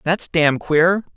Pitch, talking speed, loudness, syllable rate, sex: 170 Hz, 155 wpm, -17 LUFS, 3.1 syllables/s, male